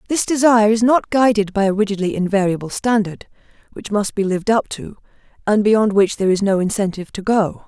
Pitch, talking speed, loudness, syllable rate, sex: 205 Hz, 195 wpm, -17 LUFS, 6.0 syllables/s, female